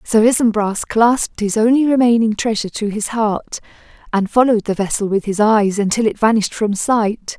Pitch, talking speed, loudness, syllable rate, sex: 220 Hz, 180 wpm, -16 LUFS, 5.3 syllables/s, female